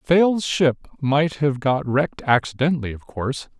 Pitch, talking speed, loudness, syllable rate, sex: 140 Hz, 150 wpm, -21 LUFS, 4.9 syllables/s, male